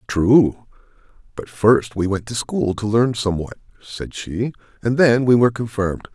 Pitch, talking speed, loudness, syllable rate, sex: 110 Hz, 165 wpm, -19 LUFS, 4.7 syllables/s, male